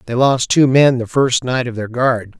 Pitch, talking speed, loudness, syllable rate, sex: 125 Hz, 250 wpm, -15 LUFS, 4.5 syllables/s, male